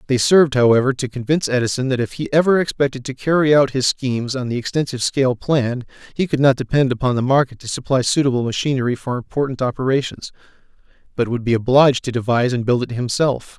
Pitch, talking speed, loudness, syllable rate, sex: 130 Hz, 200 wpm, -18 LUFS, 6.6 syllables/s, male